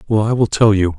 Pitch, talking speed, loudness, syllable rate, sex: 105 Hz, 305 wpm, -15 LUFS, 6.2 syllables/s, male